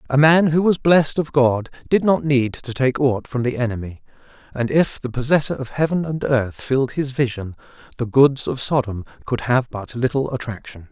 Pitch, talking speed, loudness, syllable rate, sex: 130 Hz, 200 wpm, -19 LUFS, 5.1 syllables/s, male